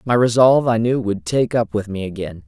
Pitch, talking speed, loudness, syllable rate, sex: 110 Hz, 240 wpm, -18 LUFS, 5.5 syllables/s, male